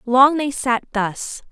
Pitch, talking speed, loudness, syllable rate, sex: 250 Hz, 160 wpm, -18 LUFS, 3.3 syllables/s, female